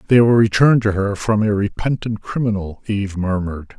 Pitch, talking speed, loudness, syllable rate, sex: 105 Hz, 175 wpm, -18 LUFS, 6.0 syllables/s, male